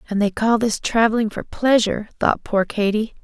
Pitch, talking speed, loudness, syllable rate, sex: 220 Hz, 185 wpm, -19 LUFS, 5.2 syllables/s, female